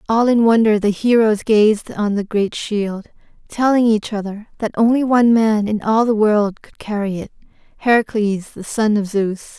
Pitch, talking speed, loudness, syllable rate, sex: 215 Hz, 175 wpm, -17 LUFS, 4.6 syllables/s, female